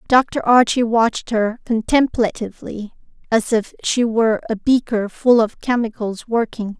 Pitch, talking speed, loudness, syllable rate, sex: 230 Hz, 135 wpm, -18 LUFS, 4.5 syllables/s, female